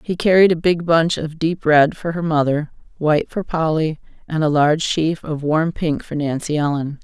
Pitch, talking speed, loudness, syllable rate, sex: 160 Hz, 205 wpm, -18 LUFS, 4.9 syllables/s, female